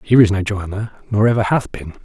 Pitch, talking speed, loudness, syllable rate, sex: 105 Hz, 235 wpm, -17 LUFS, 6.4 syllables/s, male